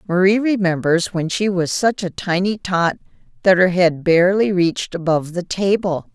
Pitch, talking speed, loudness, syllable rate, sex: 180 Hz, 165 wpm, -18 LUFS, 5.0 syllables/s, female